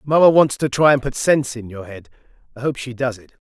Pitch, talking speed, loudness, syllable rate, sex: 130 Hz, 240 wpm, -18 LUFS, 5.7 syllables/s, male